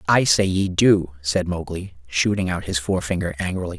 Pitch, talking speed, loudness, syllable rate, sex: 90 Hz, 175 wpm, -21 LUFS, 5.3 syllables/s, male